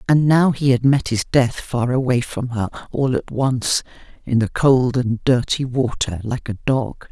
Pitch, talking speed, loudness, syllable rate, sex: 125 Hz, 195 wpm, -19 LUFS, 4.2 syllables/s, female